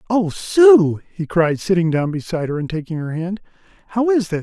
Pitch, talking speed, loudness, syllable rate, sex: 180 Hz, 205 wpm, -18 LUFS, 5.2 syllables/s, male